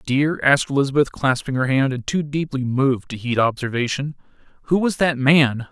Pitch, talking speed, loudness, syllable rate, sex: 135 Hz, 180 wpm, -20 LUFS, 5.4 syllables/s, male